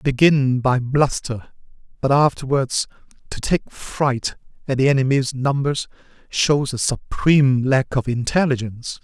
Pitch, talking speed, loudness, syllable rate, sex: 135 Hz, 125 wpm, -19 LUFS, 4.3 syllables/s, male